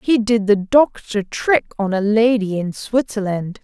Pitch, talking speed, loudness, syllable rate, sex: 215 Hz, 165 wpm, -18 LUFS, 4.2 syllables/s, female